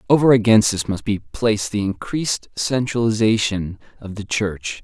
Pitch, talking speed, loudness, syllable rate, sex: 110 Hz, 150 wpm, -19 LUFS, 4.8 syllables/s, male